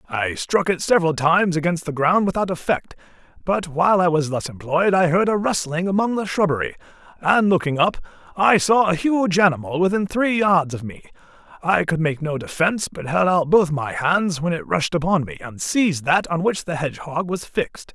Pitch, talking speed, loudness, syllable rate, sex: 170 Hz, 205 wpm, -20 LUFS, 5.3 syllables/s, male